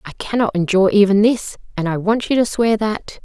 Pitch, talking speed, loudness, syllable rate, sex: 210 Hz, 220 wpm, -17 LUFS, 5.7 syllables/s, female